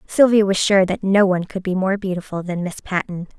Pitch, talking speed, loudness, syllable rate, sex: 190 Hz, 230 wpm, -19 LUFS, 5.6 syllables/s, female